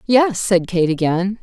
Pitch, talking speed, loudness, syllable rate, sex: 195 Hz, 170 wpm, -17 LUFS, 3.9 syllables/s, female